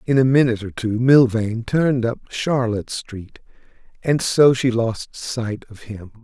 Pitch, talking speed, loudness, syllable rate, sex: 120 Hz, 165 wpm, -19 LUFS, 4.4 syllables/s, male